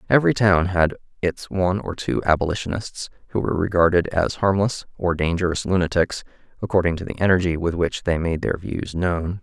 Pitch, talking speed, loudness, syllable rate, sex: 90 Hz, 170 wpm, -21 LUFS, 5.5 syllables/s, male